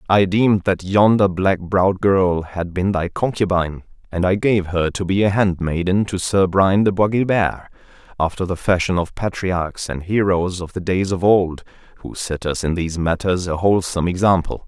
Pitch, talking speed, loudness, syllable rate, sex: 95 Hz, 190 wpm, -19 LUFS, 5.0 syllables/s, male